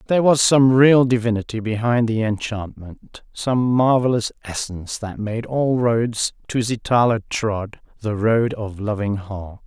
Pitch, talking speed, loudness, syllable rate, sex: 115 Hz, 135 wpm, -19 LUFS, 4.2 syllables/s, male